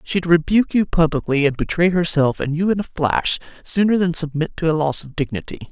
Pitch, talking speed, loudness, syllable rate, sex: 165 Hz, 210 wpm, -19 LUFS, 5.7 syllables/s, female